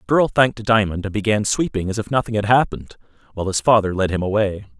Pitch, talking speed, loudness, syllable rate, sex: 105 Hz, 225 wpm, -19 LUFS, 6.8 syllables/s, male